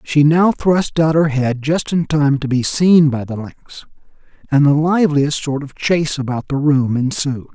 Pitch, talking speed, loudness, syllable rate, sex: 145 Hz, 200 wpm, -16 LUFS, 4.4 syllables/s, male